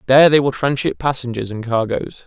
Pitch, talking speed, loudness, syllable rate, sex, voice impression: 130 Hz, 185 wpm, -17 LUFS, 5.7 syllables/s, male, very masculine, adult-like, slightly middle-aged, thick, slightly tensed, slightly weak, very bright, soft, slightly muffled, fluent, slightly raspy, very cool, very intellectual, very sincere, very calm, mature, very friendly, very reassuring, unique, very elegant, slightly wild, very sweet, very kind, very modest